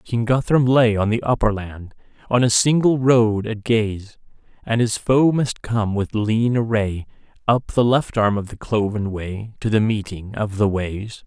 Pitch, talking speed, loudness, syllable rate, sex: 110 Hz, 185 wpm, -20 LUFS, 4.1 syllables/s, male